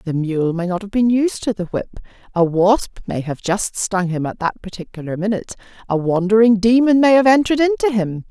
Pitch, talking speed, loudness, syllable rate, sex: 205 Hz, 210 wpm, -17 LUFS, 5.5 syllables/s, female